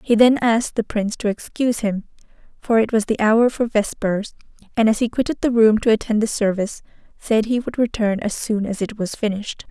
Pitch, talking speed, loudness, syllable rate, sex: 220 Hz, 215 wpm, -20 LUFS, 5.6 syllables/s, female